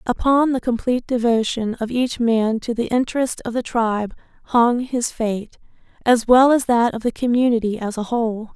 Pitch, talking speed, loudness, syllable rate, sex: 235 Hz, 180 wpm, -19 LUFS, 5.0 syllables/s, female